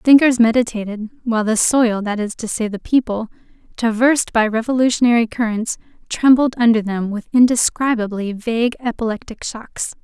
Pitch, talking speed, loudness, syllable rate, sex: 230 Hz, 140 wpm, -17 LUFS, 5.3 syllables/s, female